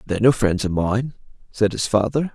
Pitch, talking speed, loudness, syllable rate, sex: 110 Hz, 205 wpm, -20 LUFS, 5.4 syllables/s, male